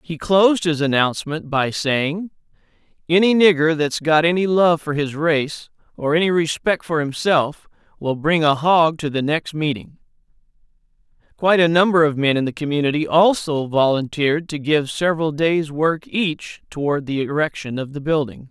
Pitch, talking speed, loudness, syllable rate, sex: 155 Hz, 160 wpm, -19 LUFS, 4.9 syllables/s, male